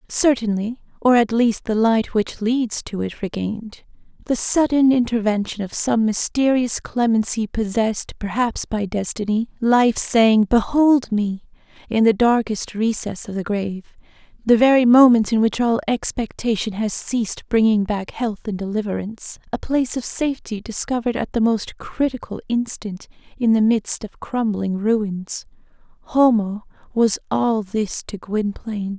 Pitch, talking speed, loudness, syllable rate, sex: 220 Hz, 140 wpm, -20 LUFS, 4.5 syllables/s, female